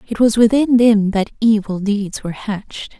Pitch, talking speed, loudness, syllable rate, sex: 215 Hz, 180 wpm, -16 LUFS, 4.8 syllables/s, female